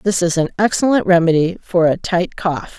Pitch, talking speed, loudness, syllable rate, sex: 180 Hz, 195 wpm, -16 LUFS, 4.9 syllables/s, female